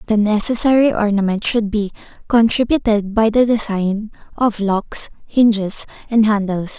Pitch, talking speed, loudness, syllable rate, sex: 215 Hz, 125 wpm, -17 LUFS, 4.9 syllables/s, female